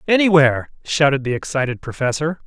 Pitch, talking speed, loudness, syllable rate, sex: 145 Hz, 120 wpm, -18 LUFS, 6.2 syllables/s, male